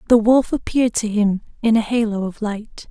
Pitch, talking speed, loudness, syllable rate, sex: 220 Hz, 205 wpm, -19 LUFS, 5.1 syllables/s, female